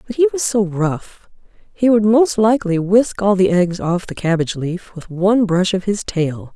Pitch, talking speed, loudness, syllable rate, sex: 195 Hz, 200 wpm, -17 LUFS, 4.8 syllables/s, female